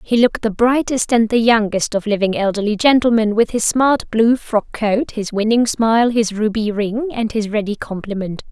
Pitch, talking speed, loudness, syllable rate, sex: 220 Hz, 190 wpm, -17 LUFS, 4.9 syllables/s, female